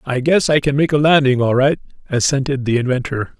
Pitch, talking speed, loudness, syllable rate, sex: 135 Hz, 210 wpm, -16 LUFS, 5.8 syllables/s, male